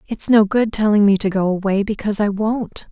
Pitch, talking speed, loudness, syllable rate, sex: 205 Hz, 225 wpm, -17 LUFS, 5.4 syllables/s, female